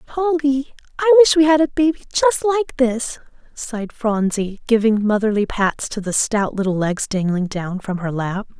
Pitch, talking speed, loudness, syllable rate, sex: 240 Hz, 175 wpm, -18 LUFS, 4.7 syllables/s, female